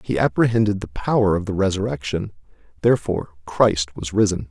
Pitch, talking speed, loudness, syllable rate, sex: 95 Hz, 145 wpm, -21 LUFS, 5.9 syllables/s, male